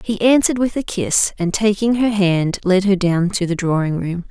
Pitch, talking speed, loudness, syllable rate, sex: 195 Hz, 225 wpm, -17 LUFS, 4.9 syllables/s, female